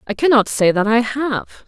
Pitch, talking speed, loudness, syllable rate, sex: 235 Hz, 215 wpm, -16 LUFS, 5.2 syllables/s, female